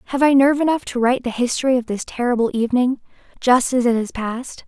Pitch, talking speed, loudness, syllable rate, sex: 250 Hz, 220 wpm, -18 LUFS, 6.8 syllables/s, female